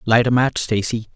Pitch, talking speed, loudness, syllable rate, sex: 115 Hz, 210 wpm, -18 LUFS, 5.2 syllables/s, male